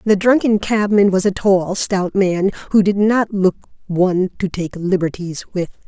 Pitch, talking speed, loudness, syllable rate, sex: 190 Hz, 175 wpm, -17 LUFS, 4.5 syllables/s, female